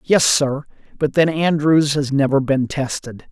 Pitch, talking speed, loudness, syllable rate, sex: 140 Hz, 165 wpm, -18 LUFS, 4.2 syllables/s, male